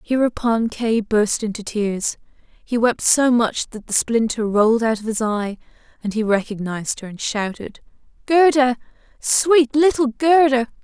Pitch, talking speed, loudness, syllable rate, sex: 235 Hz, 150 wpm, -19 LUFS, 4.3 syllables/s, female